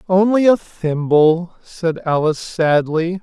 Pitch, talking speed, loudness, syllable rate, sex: 170 Hz, 110 wpm, -16 LUFS, 3.7 syllables/s, male